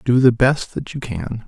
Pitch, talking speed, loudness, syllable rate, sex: 120 Hz, 245 wpm, -19 LUFS, 4.4 syllables/s, male